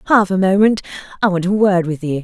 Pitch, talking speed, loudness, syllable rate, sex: 190 Hz, 240 wpm, -16 LUFS, 6.2 syllables/s, female